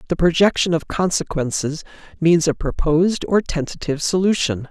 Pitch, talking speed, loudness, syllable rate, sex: 165 Hz, 125 wpm, -19 LUFS, 5.3 syllables/s, male